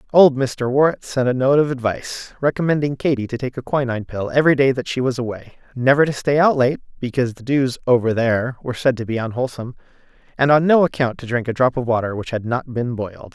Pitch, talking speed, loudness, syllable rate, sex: 125 Hz, 230 wpm, -19 LUFS, 6.4 syllables/s, male